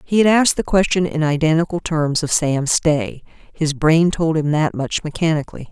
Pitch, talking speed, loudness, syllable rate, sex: 160 Hz, 180 wpm, -17 LUFS, 5.1 syllables/s, female